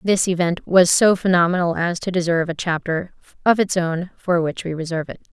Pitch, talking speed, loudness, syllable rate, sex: 175 Hz, 200 wpm, -19 LUFS, 5.6 syllables/s, female